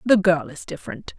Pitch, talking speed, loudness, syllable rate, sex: 190 Hz, 200 wpm, -22 LUFS, 5.6 syllables/s, female